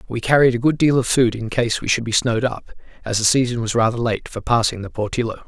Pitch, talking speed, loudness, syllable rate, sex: 115 Hz, 265 wpm, -19 LUFS, 6.3 syllables/s, male